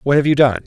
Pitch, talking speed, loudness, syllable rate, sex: 130 Hz, 365 wpm, -15 LUFS, 6.5 syllables/s, male